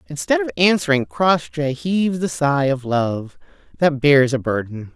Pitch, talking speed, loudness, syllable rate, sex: 150 Hz, 160 wpm, -19 LUFS, 4.4 syllables/s, female